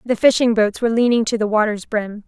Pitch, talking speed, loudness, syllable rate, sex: 220 Hz, 240 wpm, -17 LUFS, 6.0 syllables/s, female